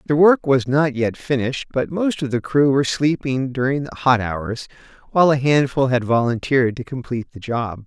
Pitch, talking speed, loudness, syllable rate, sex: 130 Hz, 200 wpm, -19 LUFS, 5.3 syllables/s, male